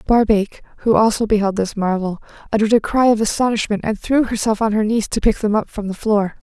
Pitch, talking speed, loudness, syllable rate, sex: 215 Hz, 220 wpm, -18 LUFS, 6.0 syllables/s, female